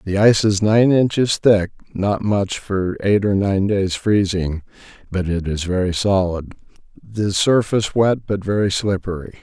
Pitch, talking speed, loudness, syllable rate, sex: 100 Hz, 155 wpm, -18 LUFS, 4.4 syllables/s, male